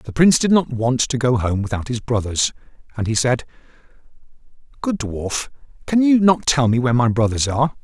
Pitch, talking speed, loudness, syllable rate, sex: 130 Hz, 190 wpm, -18 LUFS, 5.5 syllables/s, male